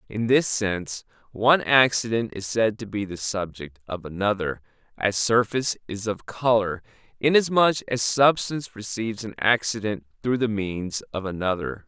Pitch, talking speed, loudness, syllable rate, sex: 105 Hz, 145 wpm, -24 LUFS, 4.8 syllables/s, male